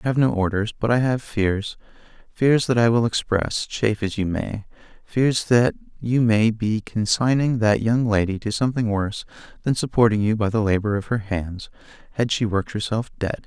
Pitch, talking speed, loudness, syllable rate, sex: 110 Hz, 185 wpm, -21 LUFS, 5.1 syllables/s, male